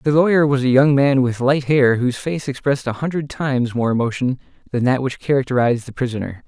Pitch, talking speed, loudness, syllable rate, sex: 130 Hz, 215 wpm, -18 LUFS, 6.1 syllables/s, male